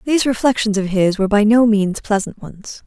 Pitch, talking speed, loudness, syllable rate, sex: 215 Hz, 210 wpm, -16 LUFS, 5.5 syllables/s, female